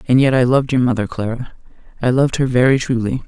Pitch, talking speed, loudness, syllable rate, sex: 130 Hz, 220 wpm, -16 LUFS, 6.8 syllables/s, female